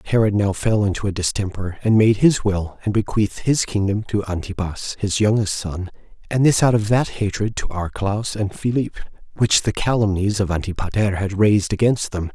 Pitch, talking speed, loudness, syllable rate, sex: 100 Hz, 190 wpm, -20 LUFS, 5.2 syllables/s, male